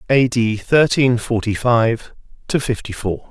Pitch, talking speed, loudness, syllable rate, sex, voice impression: 120 Hz, 145 wpm, -18 LUFS, 3.9 syllables/s, male, masculine, adult-like, slightly refreshing, sincere, slightly calm, slightly kind